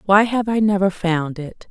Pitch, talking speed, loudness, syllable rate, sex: 195 Hz, 210 wpm, -18 LUFS, 4.5 syllables/s, female